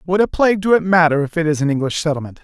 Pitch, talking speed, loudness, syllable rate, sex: 165 Hz, 295 wpm, -16 LUFS, 7.4 syllables/s, male